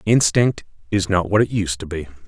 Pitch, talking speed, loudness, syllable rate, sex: 100 Hz, 210 wpm, -20 LUFS, 5.2 syllables/s, male